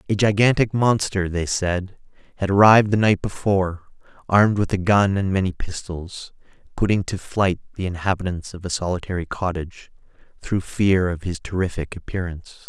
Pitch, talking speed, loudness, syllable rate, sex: 95 Hz, 150 wpm, -21 LUFS, 5.4 syllables/s, male